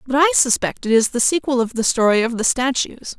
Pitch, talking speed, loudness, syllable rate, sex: 250 Hz, 245 wpm, -17 LUFS, 5.7 syllables/s, female